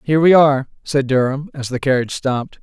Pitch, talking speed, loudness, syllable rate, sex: 140 Hz, 205 wpm, -17 LUFS, 6.5 syllables/s, male